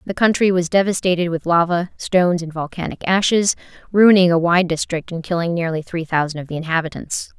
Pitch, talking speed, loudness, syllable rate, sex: 175 Hz, 180 wpm, -18 LUFS, 5.7 syllables/s, female